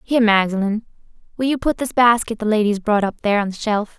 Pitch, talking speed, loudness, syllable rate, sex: 220 Hz, 225 wpm, -18 LUFS, 6.2 syllables/s, female